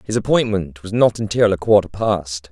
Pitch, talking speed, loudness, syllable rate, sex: 100 Hz, 190 wpm, -18 LUFS, 5.0 syllables/s, male